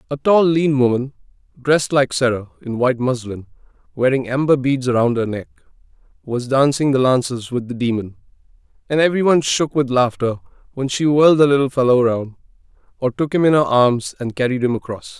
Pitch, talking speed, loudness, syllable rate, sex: 130 Hz, 180 wpm, -17 LUFS, 5.6 syllables/s, male